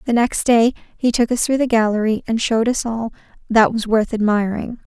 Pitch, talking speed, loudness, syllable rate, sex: 230 Hz, 205 wpm, -18 LUFS, 5.4 syllables/s, female